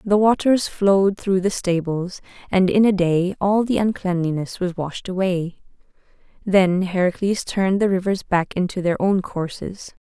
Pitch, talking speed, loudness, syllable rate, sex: 190 Hz, 155 wpm, -20 LUFS, 4.4 syllables/s, female